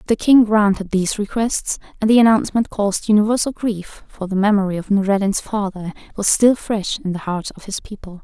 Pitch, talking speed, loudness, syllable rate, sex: 205 Hz, 190 wpm, -18 LUFS, 5.6 syllables/s, female